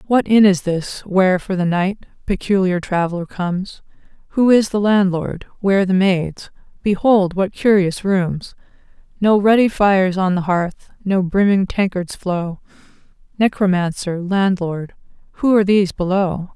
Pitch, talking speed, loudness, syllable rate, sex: 190 Hz, 140 wpm, -17 LUFS, 4.5 syllables/s, female